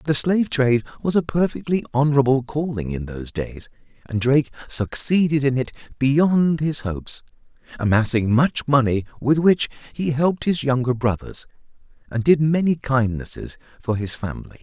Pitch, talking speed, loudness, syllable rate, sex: 135 Hz, 150 wpm, -21 LUFS, 5.1 syllables/s, male